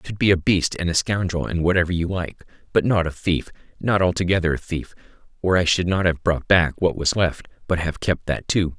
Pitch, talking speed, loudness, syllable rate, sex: 85 Hz, 240 wpm, -21 LUFS, 5.6 syllables/s, male